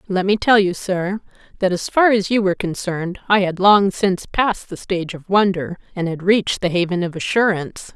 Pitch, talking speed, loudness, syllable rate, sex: 190 Hz, 210 wpm, -18 LUFS, 5.6 syllables/s, female